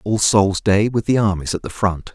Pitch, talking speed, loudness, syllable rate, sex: 100 Hz, 250 wpm, -18 LUFS, 4.9 syllables/s, male